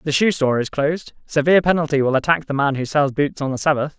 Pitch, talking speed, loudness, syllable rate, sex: 145 Hz, 255 wpm, -19 LUFS, 6.7 syllables/s, male